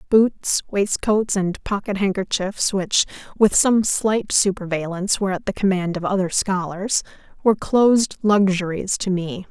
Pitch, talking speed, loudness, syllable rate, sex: 195 Hz, 140 wpm, -20 LUFS, 4.5 syllables/s, female